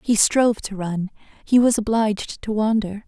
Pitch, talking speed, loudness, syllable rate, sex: 215 Hz, 175 wpm, -20 LUFS, 4.9 syllables/s, female